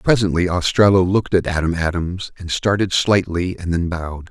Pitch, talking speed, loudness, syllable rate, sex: 90 Hz, 165 wpm, -18 LUFS, 5.3 syllables/s, male